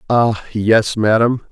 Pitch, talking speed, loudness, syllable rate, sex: 110 Hz, 120 wpm, -15 LUFS, 3.3 syllables/s, male